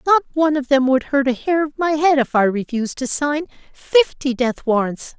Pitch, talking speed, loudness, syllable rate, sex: 275 Hz, 220 wpm, -18 LUFS, 5.2 syllables/s, female